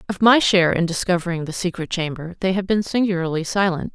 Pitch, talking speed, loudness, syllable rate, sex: 180 Hz, 200 wpm, -20 LUFS, 6.2 syllables/s, female